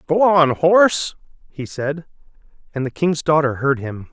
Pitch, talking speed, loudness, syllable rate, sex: 155 Hz, 160 wpm, -17 LUFS, 4.4 syllables/s, male